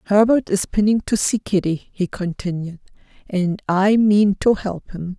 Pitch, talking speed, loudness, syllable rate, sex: 195 Hz, 160 wpm, -19 LUFS, 4.3 syllables/s, female